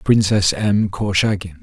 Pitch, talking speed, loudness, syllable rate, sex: 95 Hz, 110 wpm, -17 LUFS, 4.0 syllables/s, male